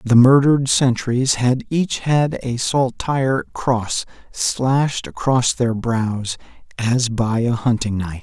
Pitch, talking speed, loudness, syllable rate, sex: 125 Hz, 130 wpm, -18 LUFS, 3.7 syllables/s, male